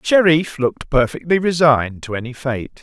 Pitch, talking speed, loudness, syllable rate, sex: 145 Hz, 150 wpm, -17 LUFS, 5.2 syllables/s, male